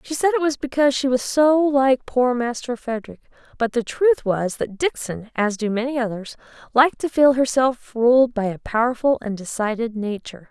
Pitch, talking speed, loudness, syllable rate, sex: 245 Hz, 190 wpm, -20 LUFS, 5.1 syllables/s, female